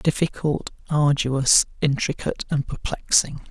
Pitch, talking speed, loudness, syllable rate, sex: 150 Hz, 85 wpm, -22 LUFS, 4.4 syllables/s, male